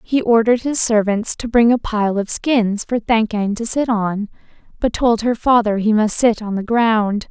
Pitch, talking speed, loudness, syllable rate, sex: 220 Hz, 205 wpm, -17 LUFS, 4.6 syllables/s, female